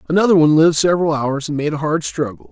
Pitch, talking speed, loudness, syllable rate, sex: 155 Hz, 240 wpm, -16 LUFS, 7.3 syllables/s, male